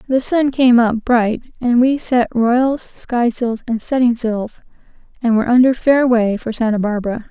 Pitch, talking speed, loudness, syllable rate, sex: 240 Hz, 170 wpm, -16 LUFS, 4.5 syllables/s, female